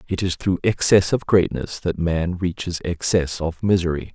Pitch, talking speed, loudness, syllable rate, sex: 90 Hz, 175 wpm, -21 LUFS, 4.7 syllables/s, male